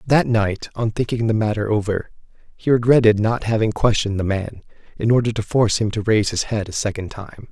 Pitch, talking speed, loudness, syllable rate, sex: 110 Hz, 210 wpm, -19 LUFS, 5.8 syllables/s, male